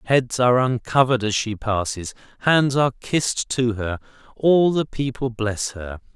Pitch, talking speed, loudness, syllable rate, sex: 120 Hz, 155 wpm, -21 LUFS, 4.7 syllables/s, male